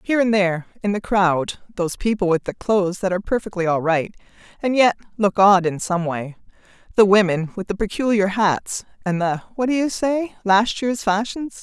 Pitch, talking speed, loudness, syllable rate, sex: 200 Hz, 185 wpm, -20 LUFS, 5.3 syllables/s, female